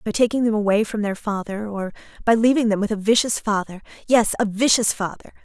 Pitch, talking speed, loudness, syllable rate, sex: 215 Hz, 200 wpm, -20 LUFS, 6.1 syllables/s, female